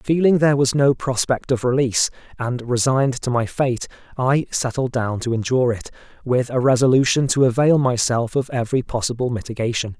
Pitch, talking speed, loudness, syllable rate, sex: 125 Hz, 170 wpm, -19 LUFS, 5.6 syllables/s, male